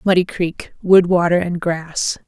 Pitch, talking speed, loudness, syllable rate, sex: 175 Hz, 130 wpm, -17 LUFS, 4.0 syllables/s, female